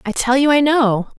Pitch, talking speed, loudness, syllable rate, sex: 255 Hz, 250 wpm, -15 LUFS, 4.9 syllables/s, female